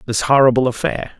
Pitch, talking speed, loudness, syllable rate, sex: 125 Hz, 150 wpm, -16 LUFS, 6.1 syllables/s, male